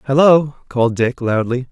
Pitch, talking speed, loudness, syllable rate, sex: 130 Hz, 140 wpm, -16 LUFS, 4.9 syllables/s, male